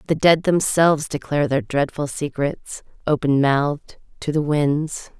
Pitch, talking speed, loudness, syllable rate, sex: 145 Hz, 140 wpm, -20 LUFS, 4.4 syllables/s, female